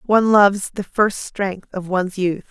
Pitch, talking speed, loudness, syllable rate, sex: 195 Hz, 190 wpm, -18 LUFS, 4.5 syllables/s, female